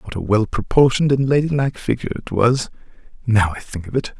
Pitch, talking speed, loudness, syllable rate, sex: 120 Hz, 200 wpm, -19 LUFS, 6.4 syllables/s, male